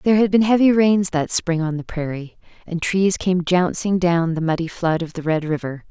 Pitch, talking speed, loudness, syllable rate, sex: 175 Hz, 225 wpm, -19 LUFS, 5.0 syllables/s, female